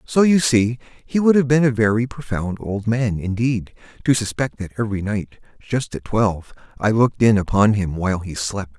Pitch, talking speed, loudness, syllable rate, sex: 110 Hz, 200 wpm, -20 LUFS, 5.1 syllables/s, male